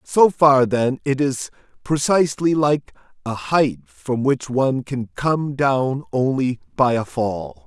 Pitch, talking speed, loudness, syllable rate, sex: 135 Hz, 150 wpm, -20 LUFS, 3.6 syllables/s, male